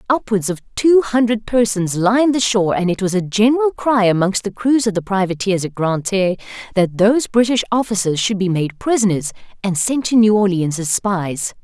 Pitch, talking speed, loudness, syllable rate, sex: 205 Hz, 195 wpm, -17 LUFS, 5.3 syllables/s, female